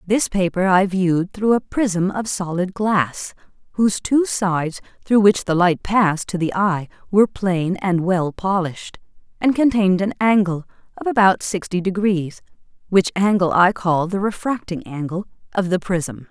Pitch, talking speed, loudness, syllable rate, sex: 190 Hz, 160 wpm, -19 LUFS, 4.6 syllables/s, female